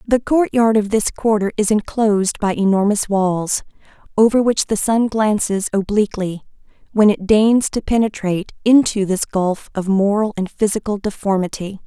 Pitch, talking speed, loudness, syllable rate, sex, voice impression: 210 Hz, 150 wpm, -17 LUFS, 4.9 syllables/s, female, feminine, adult-like, slightly relaxed, powerful, soft, fluent, slightly raspy, intellectual, calm, friendly, reassuring, elegant, lively, kind, slightly modest